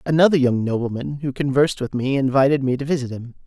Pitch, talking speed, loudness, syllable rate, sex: 135 Hz, 210 wpm, -20 LUFS, 6.5 syllables/s, male